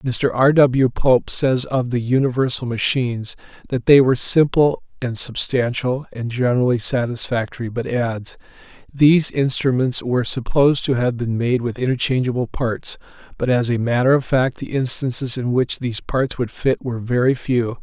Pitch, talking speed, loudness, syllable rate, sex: 125 Hz, 160 wpm, -19 LUFS, 4.9 syllables/s, male